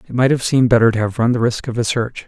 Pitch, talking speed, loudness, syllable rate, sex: 120 Hz, 345 wpm, -16 LUFS, 7.0 syllables/s, male